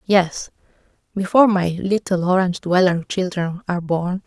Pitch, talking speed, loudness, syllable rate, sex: 185 Hz, 125 wpm, -19 LUFS, 4.9 syllables/s, female